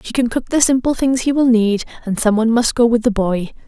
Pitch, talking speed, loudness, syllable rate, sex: 235 Hz, 275 wpm, -16 LUFS, 5.8 syllables/s, female